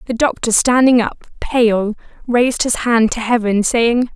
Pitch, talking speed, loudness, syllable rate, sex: 235 Hz, 160 wpm, -15 LUFS, 4.3 syllables/s, female